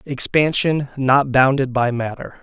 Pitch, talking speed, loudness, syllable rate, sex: 135 Hz, 125 wpm, -18 LUFS, 4.0 syllables/s, male